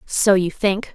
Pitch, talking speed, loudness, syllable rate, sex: 195 Hz, 190 wpm, -18 LUFS, 3.5 syllables/s, female